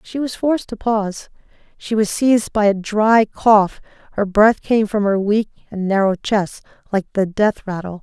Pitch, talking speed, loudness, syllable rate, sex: 210 Hz, 185 wpm, -18 LUFS, 4.6 syllables/s, female